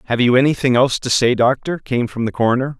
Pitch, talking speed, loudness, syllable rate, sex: 125 Hz, 235 wpm, -16 LUFS, 6.6 syllables/s, male